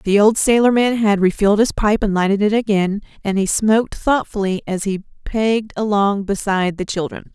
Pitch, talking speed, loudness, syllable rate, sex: 205 Hz, 180 wpm, -17 LUFS, 5.3 syllables/s, female